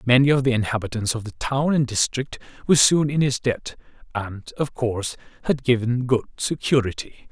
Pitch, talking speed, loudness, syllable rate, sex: 125 Hz, 170 wpm, -22 LUFS, 5.5 syllables/s, male